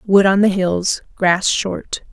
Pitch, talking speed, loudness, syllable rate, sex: 190 Hz, 170 wpm, -17 LUFS, 3.3 syllables/s, female